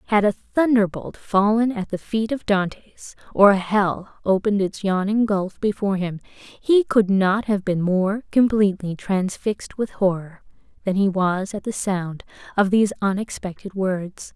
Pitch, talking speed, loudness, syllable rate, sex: 200 Hz, 155 wpm, -21 LUFS, 4.4 syllables/s, female